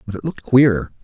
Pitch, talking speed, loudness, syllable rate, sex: 115 Hz, 230 wpm, -16 LUFS, 6.1 syllables/s, male